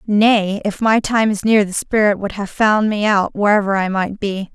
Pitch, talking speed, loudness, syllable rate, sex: 205 Hz, 225 wpm, -16 LUFS, 4.6 syllables/s, female